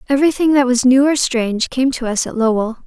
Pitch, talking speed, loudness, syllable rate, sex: 255 Hz, 230 wpm, -15 LUFS, 6.1 syllables/s, female